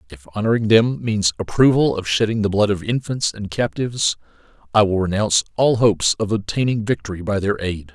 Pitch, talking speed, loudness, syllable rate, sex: 105 Hz, 180 wpm, -19 LUFS, 5.7 syllables/s, male